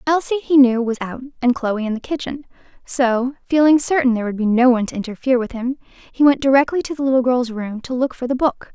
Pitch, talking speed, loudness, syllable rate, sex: 255 Hz, 240 wpm, -18 LUFS, 6.2 syllables/s, female